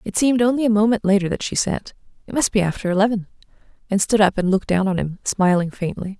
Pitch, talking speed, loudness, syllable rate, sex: 200 Hz, 235 wpm, -19 LUFS, 6.6 syllables/s, female